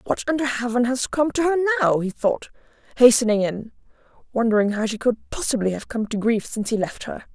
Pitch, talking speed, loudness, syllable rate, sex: 240 Hz, 205 wpm, -21 LUFS, 6.0 syllables/s, female